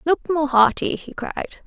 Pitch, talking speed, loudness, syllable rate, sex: 300 Hz, 180 wpm, -20 LUFS, 4.2 syllables/s, female